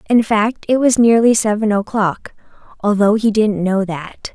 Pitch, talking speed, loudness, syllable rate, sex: 210 Hz, 165 wpm, -15 LUFS, 4.4 syllables/s, female